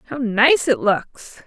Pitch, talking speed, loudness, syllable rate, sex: 245 Hz, 165 wpm, -17 LUFS, 2.8 syllables/s, female